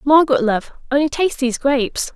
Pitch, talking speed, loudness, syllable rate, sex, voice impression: 280 Hz, 165 wpm, -18 LUFS, 6.4 syllables/s, female, very feminine, young, slightly adult-like, very thin, slightly tensed, slightly weak, very bright, hard, very clear, very fluent, very cute, very intellectual, refreshing, sincere, slightly calm, very friendly, reassuring, very unique, very elegant, sweet, very lively, kind, intense, slightly sharp, very light